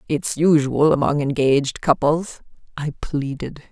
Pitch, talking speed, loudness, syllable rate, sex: 145 Hz, 115 wpm, -20 LUFS, 4.2 syllables/s, female